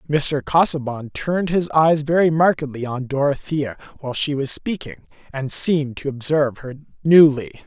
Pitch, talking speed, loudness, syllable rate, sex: 145 Hz, 150 wpm, -19 LUFS, 5.0 syllables/s, male